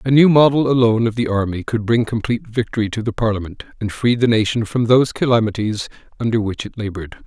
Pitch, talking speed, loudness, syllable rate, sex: 115 Hz, 205 wpm, -18 LUFS, 6.5 syllables/s, male